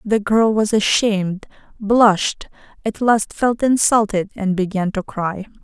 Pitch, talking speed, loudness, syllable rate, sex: 210 Hz, 140 wpm, -18 LUFS, 4.1 syllables/s, female